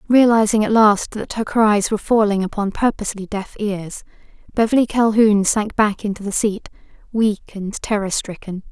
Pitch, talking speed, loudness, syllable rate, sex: 210 Hz, 160 wpm, -18 LUFS, 5.0 syllables/s, female